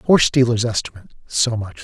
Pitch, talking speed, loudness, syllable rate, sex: 115 Hz, 165 wpm, -18 LUFS, 6.0 syllables/s, male